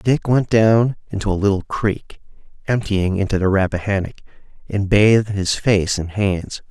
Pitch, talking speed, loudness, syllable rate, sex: 100 Hz, 150 wpm, -18 LUFS, 4.6 syllables/s, male